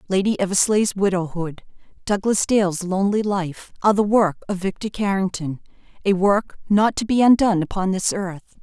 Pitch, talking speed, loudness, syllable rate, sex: 195 Hz, 145 wpm, -20 LUFS, 5.3 syllables/s, female